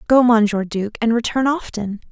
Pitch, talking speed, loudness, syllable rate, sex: 230 Hz, 170 wpm, -18 LUFS, 4.9 syllables/s, female